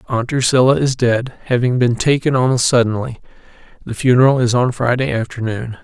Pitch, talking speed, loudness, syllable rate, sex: 125 Hz, 155 wpm, -16 LUFS, 5.4 syllables/s, male